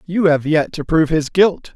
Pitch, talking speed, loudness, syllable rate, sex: 160 Hz, 240 wpm, -16 LUFS, 4.9 syllables/s, male